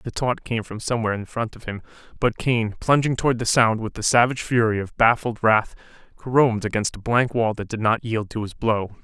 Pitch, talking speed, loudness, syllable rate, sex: 115 Hz, 225 wpm, -22 LUFS, 5.7 syllables/s, male